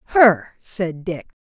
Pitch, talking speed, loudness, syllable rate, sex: 185 Hz, 125 wpm, -19 LUFS, 3.0 syllables/s, female